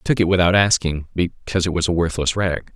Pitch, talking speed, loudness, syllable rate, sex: 90 Hz, 240 wpm, -19 LUFS, 6.0 syllables/s, male